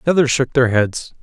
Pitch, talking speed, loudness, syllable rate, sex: 130 Hz, 245 wpm, -16 LUFS, 5.7 syllables/s, male